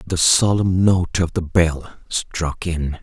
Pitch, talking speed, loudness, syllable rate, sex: 85 Hz, 160 wpm, -19 LUFS, 3.2 syllables/s, male